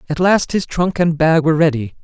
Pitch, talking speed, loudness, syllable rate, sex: 160 Hz, 235 wpm, -15 LUFS, 5.5 syllables/s, male